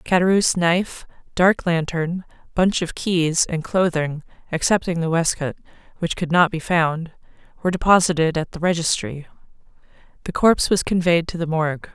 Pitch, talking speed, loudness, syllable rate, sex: 170 Hz, 145 wpm, -20 LUFS, 5.1 syllables/s, female